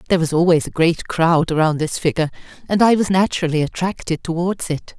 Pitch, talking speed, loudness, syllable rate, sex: 170 Hz, 195 wpm, -18 LUFS, 6.1 syllables/s, female